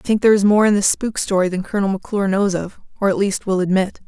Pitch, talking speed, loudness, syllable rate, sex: 195 Hz, 280 wpm, -18 LUFS, 7.3 syllables/s, female